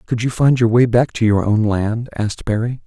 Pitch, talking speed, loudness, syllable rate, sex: 115 Hz, 250 wpm, -17 LUFS, 5.2 syllables/s, male